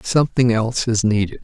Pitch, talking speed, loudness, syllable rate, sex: 115 Hz, 165 wpm, -18 LUFS, 6.2 syllables/s, male